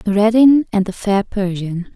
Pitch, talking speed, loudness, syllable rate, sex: 205 Hz, 155 wpm, -16 LUFS, 4.6 syllables/s, female